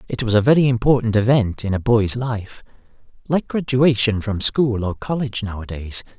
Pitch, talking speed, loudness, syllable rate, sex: 115 Hz, 165 wpm, -19 LUFS, 5.1 syllables/s, male